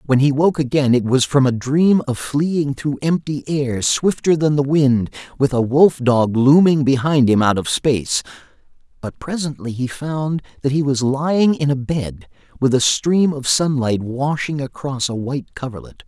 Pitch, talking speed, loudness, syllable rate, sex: 140 Hz, 185 wpm, -17 LUFS, 4.5 syllables/s, male